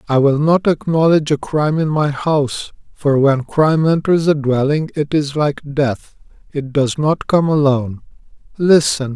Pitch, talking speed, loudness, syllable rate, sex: 145 Hz, 155 wpm, -16 LUFS, 4.6 syllables/s, male